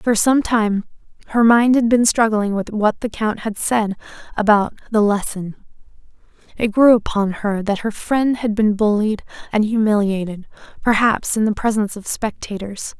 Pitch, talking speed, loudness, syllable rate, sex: 215 Hz, 160 wpm, -18 LUFS, 4.6 syllables/s, female